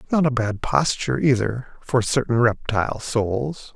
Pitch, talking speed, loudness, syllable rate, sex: 120 Hz, 145 wpm, -22 LUFS, 4.4 syllables/s, male